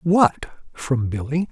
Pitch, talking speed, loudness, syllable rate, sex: 150 Hz, 120 wpm, -21 LUFS, 3.1 syllables/s, male